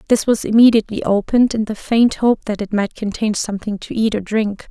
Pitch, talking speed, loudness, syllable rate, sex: 215 Hz, 215 wpm, -17 LUFS, 5.8 syllables/s, female